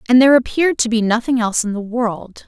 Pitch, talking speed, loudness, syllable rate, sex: 235 Hz, 245 wpm, -16 LUFS, 6.6 syllables/s, female